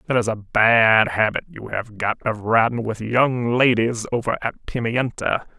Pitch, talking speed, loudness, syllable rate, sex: 115 Hz, 170 wpm, -20 LUFS, 4.4 syllables/s, male